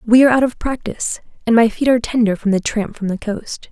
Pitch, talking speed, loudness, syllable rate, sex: 230 Hz, 260 wpm, -17 LUFS, 6.3 syllables/s, female